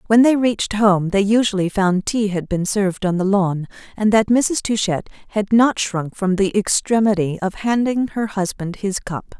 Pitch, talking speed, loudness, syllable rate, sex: 205 Hz, 190 wpm, -18 LUFS, 4.7 syllables/s, female